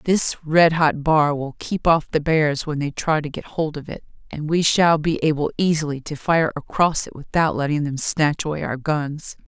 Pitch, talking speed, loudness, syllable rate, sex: 155 Hz, 215 wpm, -20 LUFS, 4.7 syllables/s, female